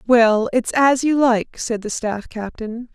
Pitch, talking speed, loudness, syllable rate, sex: 235 Hz, 185 wpm, -19 LUFS, 3.6 syllables/s, female